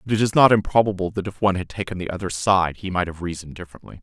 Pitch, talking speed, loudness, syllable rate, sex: 95 Hz, 270 wpm, -21 LUFS, 7.4 syllables/s, male